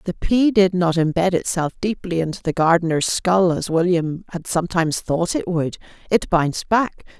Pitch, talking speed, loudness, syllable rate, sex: 175 Hz, 175 wpm, -20 LUFS, 5.0 syllables/s, female